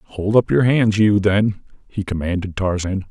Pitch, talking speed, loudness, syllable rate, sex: 100 Hz, 175 wpm, -18 LUFS, 4.3 syllables/s, male